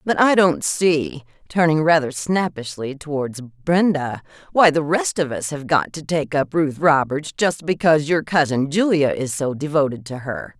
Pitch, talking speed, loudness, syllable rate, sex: 150 Hz, 175 wpm, -19 LUFS, 4.4 syllables/s, female